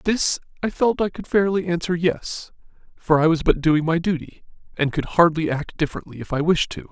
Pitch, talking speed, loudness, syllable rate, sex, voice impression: 170 Hz, 215 wpm, -21 LUFS, 5.4 syllables/s, male, masculine, adult-like, thick, tensed, hard, clear, cool, intellectual, wild, lively